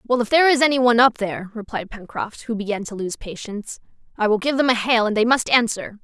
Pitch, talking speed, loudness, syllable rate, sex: 230 Hz, 250 wpm, -20 LUFS, 6.5 syllables/s, female